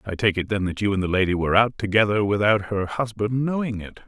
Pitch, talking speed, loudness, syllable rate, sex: 105 Hz, 250 wpm, -22 LUFS, 6.2 syllables/s, male